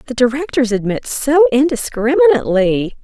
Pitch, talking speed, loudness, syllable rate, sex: 255 Hz, 100 wpm, -14 LUFS, 4.8 syllables/s, female